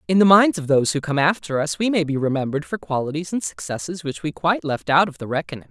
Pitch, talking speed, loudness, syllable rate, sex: 155 Hz, 265 wpm, -21 LUFS, 6.7 syllables/s, male